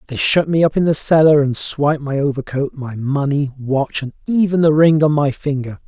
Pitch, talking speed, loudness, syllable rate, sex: 145 Hz, 215 wpm, -16 LUFS, 5.2 syllables/s, male